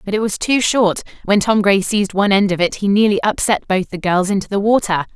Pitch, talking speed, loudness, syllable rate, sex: 200 Hz, 255 wpm, -16 LUFS, 5.9 syllables/s, female